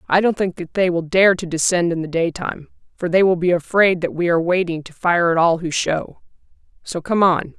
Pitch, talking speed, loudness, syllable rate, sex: 175 Hz, 235 wpm, -18 LUFS, 5.5 syllables/s, female